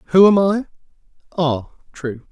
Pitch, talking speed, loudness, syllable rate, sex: 165 Hz, 105 wpm, -18 LUFS, 4.4 syllables/s, male